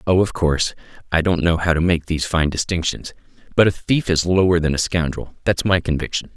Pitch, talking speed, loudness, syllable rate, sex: 85 Hz, 215 wpm, -19 LUFS, 5.8 syllables/s, male